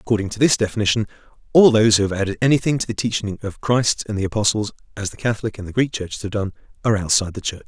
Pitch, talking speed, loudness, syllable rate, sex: 105 Hz, 235 wpm, -20 LUFS, 7.4 syllables/s, male